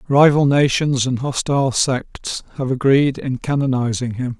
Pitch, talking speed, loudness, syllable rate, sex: 135 Hz, 135 wpm, -18 LUFS, 4.4 syllables/s, male